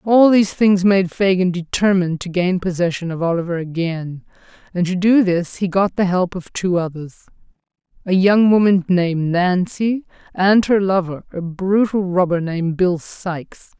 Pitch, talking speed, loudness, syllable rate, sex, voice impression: 185 Hz, 155 wpm, -17 LUFS, 4.7 syllables/s, female, very feminine, young, thin, slightly tensed, slightly weak, bright, soft, clear, fluent, cute, slightly cool, intellectual, refreshing, sincere, very calm, very friendly, very reassuring, unique, very elegant, wild, slightly sweet, lively, kind, slightly modest, light